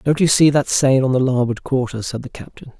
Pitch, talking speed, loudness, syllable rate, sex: 130 Hz, 260 wpm, -17 LUFS, 5.6 syllables/s, male